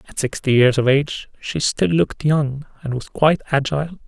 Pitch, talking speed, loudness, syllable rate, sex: 140 Hz, 190 wpm, -19 LUFS, 5.5 syllables/s, male